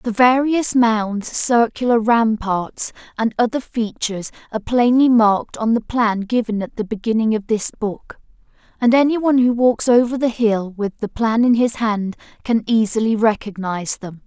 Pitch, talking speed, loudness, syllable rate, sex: 225 Hz, 160 wpm, -18 LUFS, 4.7 syllables/s, female